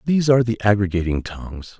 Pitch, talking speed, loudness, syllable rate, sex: 105 Hz, 165 wpm, -19 LUFS, 7.0 syllables/s, male